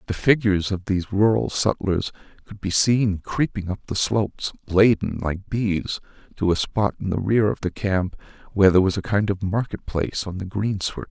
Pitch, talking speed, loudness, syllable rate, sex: 100 Hz, 195 wpm, -22 LUFS, 5.1 syllables/s, male